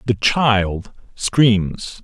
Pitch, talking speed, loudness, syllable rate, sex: 110 Hz, 90 wpm, -17 LUFS, 1.8 syllables/s, male